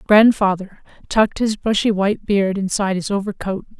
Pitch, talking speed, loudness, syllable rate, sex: 200 Hz, 140 wpm, -18 LUFS, 5.5 syllables/s, female